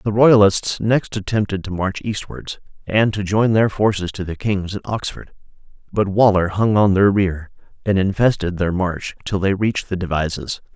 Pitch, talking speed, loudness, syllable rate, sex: 100 Hz, 180 wpm, -19 LUFS, 4.8 syllables/s, male